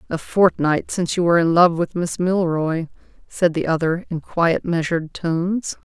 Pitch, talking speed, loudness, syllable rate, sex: 170 Hz, 175 wpm, -20 LUFS, 4.8 syllables/s, female